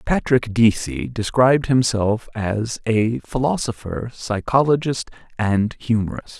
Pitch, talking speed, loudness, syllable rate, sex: 110 Hz, 95 wpm, -20 LUFS, 3.9 syllables/s, male